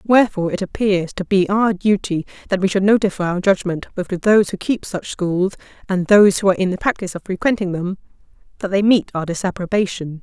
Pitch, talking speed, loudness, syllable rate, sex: 190 Hz, 205 wpm, -18 LUFS, 6.1 syllables/s, female